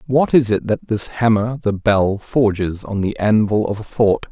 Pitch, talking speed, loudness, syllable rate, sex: 110 Hz, 195 wpm, -18 LUFS, 4.2 syllables/s, male